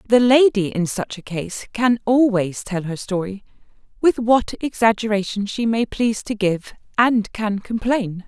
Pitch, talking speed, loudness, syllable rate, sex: 215 Hz, 160 wpm, -20 LUFS, 4.4 syllables/s, female